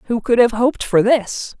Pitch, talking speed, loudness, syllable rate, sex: 230 Hz, 225 wpm, -16 LUFS, 5.0 syllables/s, female